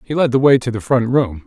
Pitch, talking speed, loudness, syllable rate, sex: 125 Hz, 330 wpm, -15 LUFS, 5.8 syllables/s, male